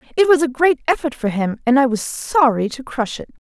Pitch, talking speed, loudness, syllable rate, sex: 265 Hz, 205 wpm, -18 LUFS, 5.6 syllables/s, female